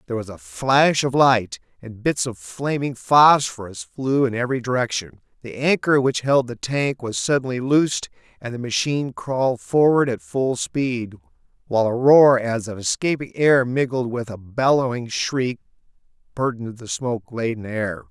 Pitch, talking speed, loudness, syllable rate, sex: 125 Hz, 160 wpm, -20 LUFS, 4.8 syllables/s, male